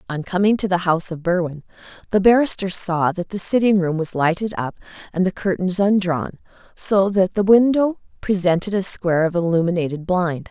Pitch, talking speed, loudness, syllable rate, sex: 185 Hz, 175 wpm, -19 LUFS, 5.4 syllables/s, female